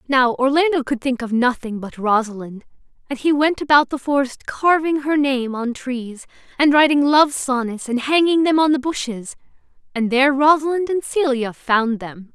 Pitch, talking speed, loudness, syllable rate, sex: 270 Hz, 175 wpm, -18 LUFS, 4.8 syllables/s, female